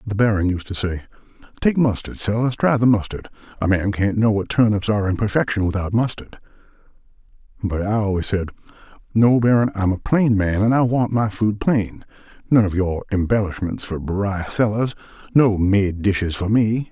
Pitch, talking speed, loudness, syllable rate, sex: 105 Hz, 165 wpm, -20 LUFS, 5.2 syllables/s, male